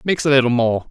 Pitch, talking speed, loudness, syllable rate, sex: 135 Hz, 265 wpm, -16 LUFS, 6.3 syllables/s, male